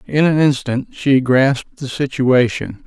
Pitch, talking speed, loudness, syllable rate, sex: 135 Hz, 145 wpm, -16 LUFS, 4.0 syllables/s, male